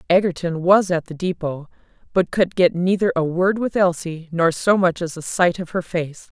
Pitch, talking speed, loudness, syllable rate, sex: 175 Hz, 205 wpm, -20 LUFS, 4.8 syllables/s, female